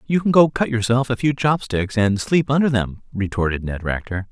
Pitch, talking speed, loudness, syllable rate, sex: 115 Hz, 210 wpm, -20 LUFS, 5.1 syllables/s, male